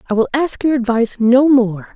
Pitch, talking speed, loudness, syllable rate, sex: 245 Hz, 215 wpm, -15 LUFS, 5.2 syllables/s, female